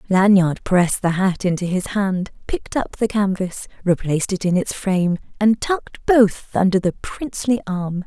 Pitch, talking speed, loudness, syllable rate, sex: 195 Hz, 170 wpm, -20 LUFS, 4.8 syllables/s, female